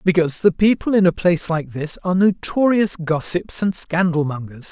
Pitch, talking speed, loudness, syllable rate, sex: 175 Hz, 180 wpm, -19 LUFS, 5.2 syllables/s, male